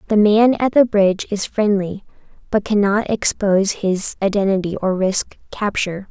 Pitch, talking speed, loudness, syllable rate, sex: 205 Hz, 145 wpm, -17 LUFS, 4.8 syllables/s, female